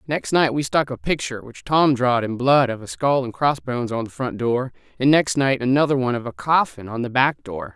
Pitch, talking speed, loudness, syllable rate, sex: 130 Hz, 250 wpm, -20 LUFS, 5.6 syllables/s, male